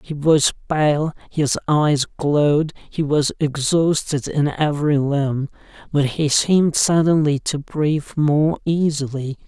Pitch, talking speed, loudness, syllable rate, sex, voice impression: 150 Hz, 125 wpm, -19 LUFS, 3.8 syllables/s, male, very masculine, old, slightly thick, relaxed, slightly weak, slightly dark, very soft, very clear, slightly muffled, slightly halting, cool, intellectual, very sincere, very calm, very mature, friendly, reassuring, unique, elegant, slightly wild, slightly sweet, slightly lively, kind, slightly modest